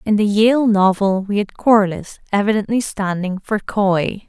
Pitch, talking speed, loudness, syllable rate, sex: 205 Hz, 155 wpm, -17 LUFS, 4.2 syllables/s, female